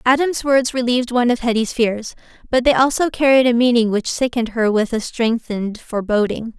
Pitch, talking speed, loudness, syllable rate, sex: 235 Hz, 180 wpm, -17 LUFS, 5.7 syllables/s, female